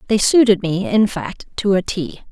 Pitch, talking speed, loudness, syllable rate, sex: 195 Hz, 205 wpm, -17 LUFS, 4.7 syllables/s, female